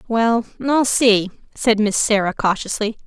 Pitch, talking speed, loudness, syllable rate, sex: 220 Hz, 135 wpm, -18 LUFS, 4.3 syllables/s, female